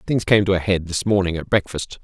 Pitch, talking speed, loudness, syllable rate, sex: 95 Hz, 265 wpm, -20 LUFS, 5.5 syllables/s, male